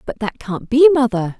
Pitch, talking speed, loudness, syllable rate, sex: 240 Hz, 215 wpm, -16 LUFS, 5.2 syllables/s, female